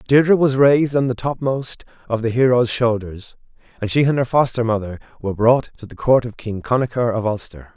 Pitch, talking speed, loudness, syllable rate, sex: 120 Hz, 200 wpm, -18 LUFS, 5.6 syllables/s, male